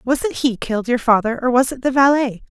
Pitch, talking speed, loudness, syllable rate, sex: 250 Hz, 255 wpm, -17 LUFS, 5.9 syllables/s, female